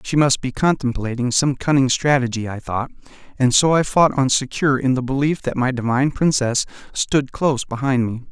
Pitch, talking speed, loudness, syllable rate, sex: 135 Hz, 190 wpm, -19 LUFS, 5.4 syllables/s, male